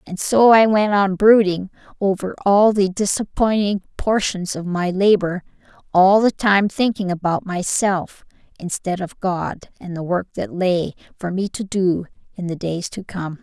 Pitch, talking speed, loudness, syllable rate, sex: 190 Hz, 165 wpm, -19 LUFS, 4.2 syllables/s, female